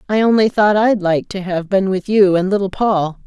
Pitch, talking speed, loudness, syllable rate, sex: 195 Hz, 240 wpm, -15 LUFS, 5.0 syllables/s, female